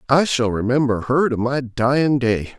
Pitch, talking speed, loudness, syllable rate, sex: 125 Hz, 185 wpm, -19 LUFS, 4.7 syllables/s, male